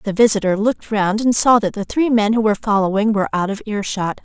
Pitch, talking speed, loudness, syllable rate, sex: 210 Hz, 255 wpm, -17 LUFS, 6.2 syllables/s, female